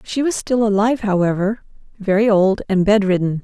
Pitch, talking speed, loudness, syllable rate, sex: 205 Hz, 155 wpm, -17 LUFS, 5.4 syllables/s, female